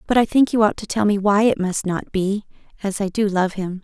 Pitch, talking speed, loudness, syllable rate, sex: 205 Hz, 265 wpm, -20 LUFS, 5.6 syllables/s, female